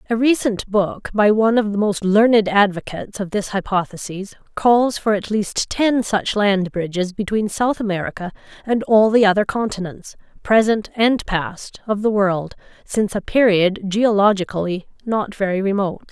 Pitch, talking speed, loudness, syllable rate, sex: 205 Hz, 155 wpm, -18 LUFS, 4.8 syllables/s, female